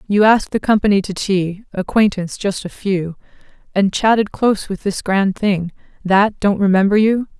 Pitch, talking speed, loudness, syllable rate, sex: 200 Hz, 170 wpm, -17 LUFS, 5.0 syllables/s, female